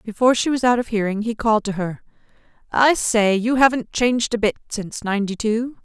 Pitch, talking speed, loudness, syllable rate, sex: 225 Hz, 205 wpm, -20 LUFS, 5.9 syllables/s, female